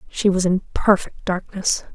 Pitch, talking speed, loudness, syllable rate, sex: 190 Hz, 155 wpm, -20 LUFS, 4.3 syllables/s, female